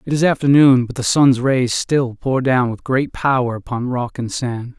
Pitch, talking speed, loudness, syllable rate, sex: 130 Hz, 215 wpm, -17 LUFS, 4.5 syllables/s, male